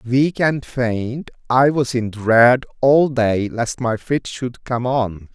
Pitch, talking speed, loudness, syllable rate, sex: 125 Hz, 170 wpm, -18 LUFS, 3.1 syllables/s, male